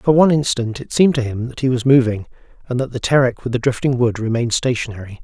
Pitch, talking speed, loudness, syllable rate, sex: 125 Hz, 240 wpm, -18 LUFS, 6.6 syllables/s, male